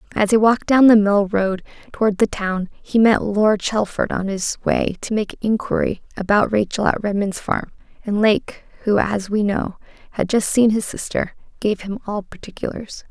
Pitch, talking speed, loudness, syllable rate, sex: 210 Hz, 185 wpm, -19 LUFS, 4.8 syllables/s, female